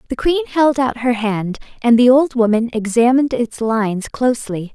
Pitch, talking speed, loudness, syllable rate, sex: 240 Hz, 175 wpm, -16 LUFS, 5.0 syllables/s, female